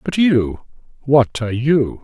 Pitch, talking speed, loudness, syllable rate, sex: 130 Hz, 120 wpm, -17 LUFS, 3.9 syllables/s, male